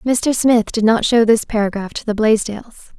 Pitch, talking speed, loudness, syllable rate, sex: 225 Hz, 200 wpm, -16 LUFS, 5.0 syllables/s, female